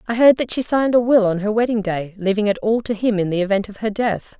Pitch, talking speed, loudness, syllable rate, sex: 215 Hz, 300 wpm, -19 LUFS, 6.2 syllables/s, female